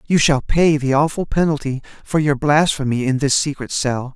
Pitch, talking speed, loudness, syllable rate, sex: 145 Hz, 190 wpm, -18 LUFS, 5.0 syllables/s, male